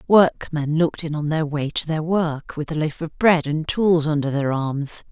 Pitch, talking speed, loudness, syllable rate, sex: 155 Hz, 225 wpm, -21 LUFS, 4.5 syllables/s, female